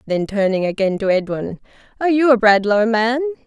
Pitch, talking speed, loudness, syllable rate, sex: 225 Hz, 175 wpm, -17 LUFS, 5.6 syllables/s, female